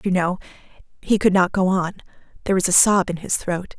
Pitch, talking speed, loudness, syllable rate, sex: 185 Hz, 220 wpm, -19 LUFS, 5.9 syllables/s, female